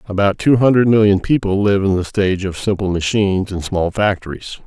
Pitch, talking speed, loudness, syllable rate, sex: 100 Hz, 195 wpm, -16 LUFS, 5.6 syllables/s, male